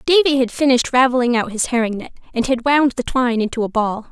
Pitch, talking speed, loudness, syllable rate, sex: 250 Hz, 235 wpm, -17 LUFS, 6.4 syllables/s, female